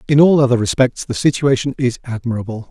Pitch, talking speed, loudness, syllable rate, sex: 125 Hz, 180 wpm, -16 LUFS, 6.1 syllables/s, male